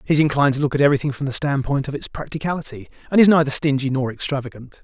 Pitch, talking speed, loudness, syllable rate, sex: 140 Hz, 235 wpm, -19 LUFS, 7.6 syllables/s, male